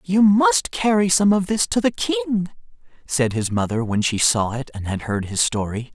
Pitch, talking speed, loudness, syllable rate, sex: 150 Hz, 210 wpm, -20 LUFS, 4.9 syllables/s, male